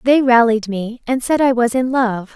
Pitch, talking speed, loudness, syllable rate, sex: 240 Hz, 230 wpm, -16 LUFS, 4.6 syllables/s, female